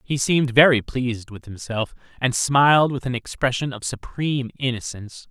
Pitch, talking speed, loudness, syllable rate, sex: 125 Hz, 160 wpm, -21 LUFS, 5.3 syllables/s, male